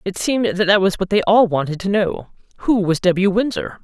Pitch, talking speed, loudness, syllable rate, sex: 195 Hz, 235 wpm, -17 LUFS, 5.4 syllables/s, female